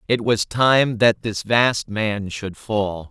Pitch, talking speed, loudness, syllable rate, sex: 110 Hz, 175 wpm, -19 LUFS, 3.1 syllables/s, male